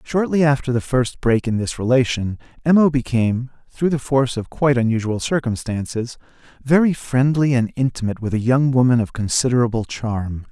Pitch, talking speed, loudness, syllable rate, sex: 125 Hz, 165 wpm, -19 LUFS, 5.5 syllables/s, male